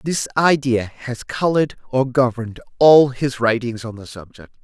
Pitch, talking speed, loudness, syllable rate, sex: 125 Hz, 155 wpm, -18 LUFS, 4.7 syllables/s, male